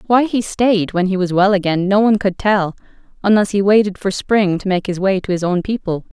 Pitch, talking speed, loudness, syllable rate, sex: 195 Hz, 240 wpm, -16 LUFS, 5.5 syllables/s, female